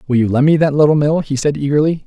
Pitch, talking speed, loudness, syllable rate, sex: 145 Hz, 290 wpm, -14 LUFS, 6.8 syllables/s, male